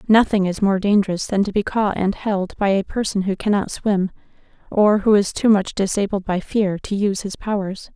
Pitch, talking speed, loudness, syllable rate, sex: 200 Hz, 210 wpm, -20 LUFS, 5.2 syllables/s, female